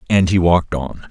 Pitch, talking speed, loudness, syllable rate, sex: 85 Hz, 220 wpm, -16 LUFS, 5.4 syllables/s, male